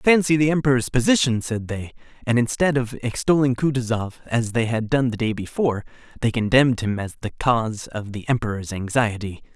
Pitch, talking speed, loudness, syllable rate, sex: 120 Hz, 175 wpm, -22 LUFS, 5.7 syllables/s, male